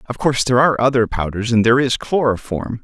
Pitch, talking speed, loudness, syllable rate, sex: 120 Hz, 190 wpm, -17 LUFS, 6.6 syllables/s, male